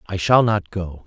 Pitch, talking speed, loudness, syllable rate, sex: 95 Hz, 225 wpm, -19 LUFS, 4.2 syllables/s, male